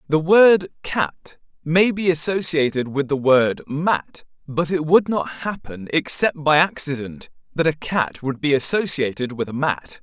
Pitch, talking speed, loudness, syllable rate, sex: 155 Hz, 160 wpm, -20 LUFS, 4.1 syllables/s, male